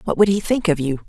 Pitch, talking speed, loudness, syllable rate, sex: 180 Hz, 335 wpm, -19 LUFS, 6.5 syllables/s, female